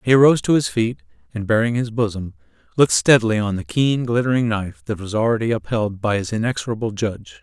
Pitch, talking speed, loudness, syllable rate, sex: 110 Hz, 195 wpm, -19 LUFS, 6.4 syllables/s, male